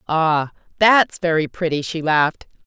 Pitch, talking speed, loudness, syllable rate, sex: 165 Hz, 135 wpm, -18 LUFS, 4.4 syllables/s, female